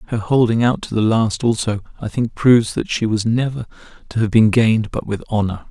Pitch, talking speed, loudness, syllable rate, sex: 115 Hz, 220 wpm, -18 LUFS, 5.6 syllables/s, male